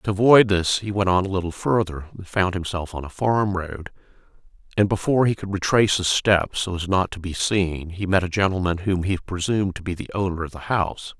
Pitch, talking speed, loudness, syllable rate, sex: 95 Hz, 230 wpm, -22 LUFS, 5.7 syllables/s, male